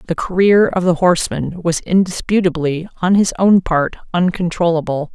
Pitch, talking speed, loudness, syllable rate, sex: 175 Hz, 140 wpm, -16 LUFS, 5.0 syllables/s, female